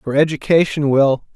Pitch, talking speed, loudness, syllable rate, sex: 145 Hz, 135 wpm, -16 LUFS, 5.2 syllables/s, male